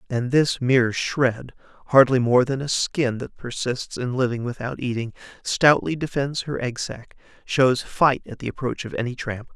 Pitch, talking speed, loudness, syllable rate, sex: 125 Hz, 175 wpm, -22 LUFS, 4.6 syllables/s, male